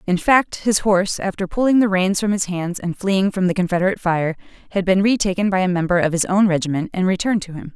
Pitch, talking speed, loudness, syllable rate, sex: 190 Hz, 240 wpm, -19 LUFS, 6.3 syllables/s, female